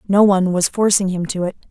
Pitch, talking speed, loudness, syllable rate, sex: 190 Hz, 245 wpm, -17 LUFS, 6.3 syllables/s, female